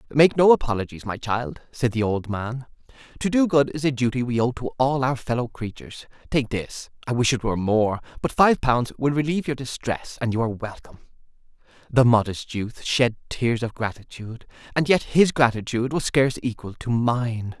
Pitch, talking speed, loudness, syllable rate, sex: 125 Hz, 190 wpm, -23 LUFS, 5.4 syllables/s, male